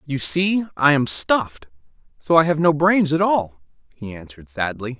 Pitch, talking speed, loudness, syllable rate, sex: 135 Hz, 180 wpm, -18 LUFS, 4.8 syllables/s, male